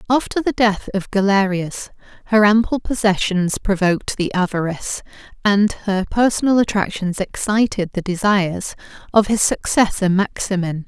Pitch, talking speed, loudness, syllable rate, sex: 200 Hz, 120 wpm, -18 LUFS, 4.8 syllables/s, female